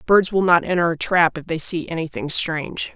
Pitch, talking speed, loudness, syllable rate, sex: 170 Hz, 225 wpm, -19 LUFS, 5.3 syllables/s, female